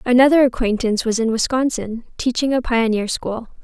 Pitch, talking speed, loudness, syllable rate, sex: 235 Hz, 150 wpm, -18 LUFS, 5.5 syllables/s, female